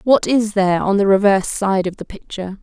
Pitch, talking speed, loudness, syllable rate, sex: 200 Hz, 230 wpm, -16 LUFS, 5.9 syllables/s, female